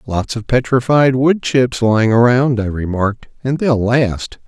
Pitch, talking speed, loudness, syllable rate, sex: 120 Hz, 160 wpm, -15 LUFS, 4.3 syllables/s, male